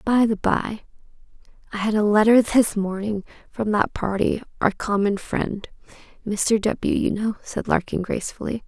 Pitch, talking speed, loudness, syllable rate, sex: 210 Hz, 145 wpm, -22 LUFS, 4.5 syllables/s, female